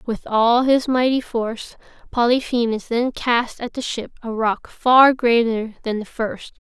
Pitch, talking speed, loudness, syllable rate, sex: 235 Hz, 160 wpm, -19 LUFS, 4.1 syllables/s, female